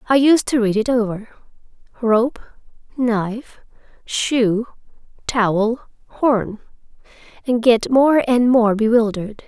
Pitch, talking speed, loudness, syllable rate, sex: 235 Hz, 110 wpm, -17 LUFS, 3.9 syllables/s, female